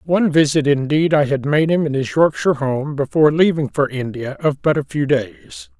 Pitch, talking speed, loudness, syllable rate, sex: 145 Hz, 205 wpm, -17 LUFS, 5.2 syllables/s, male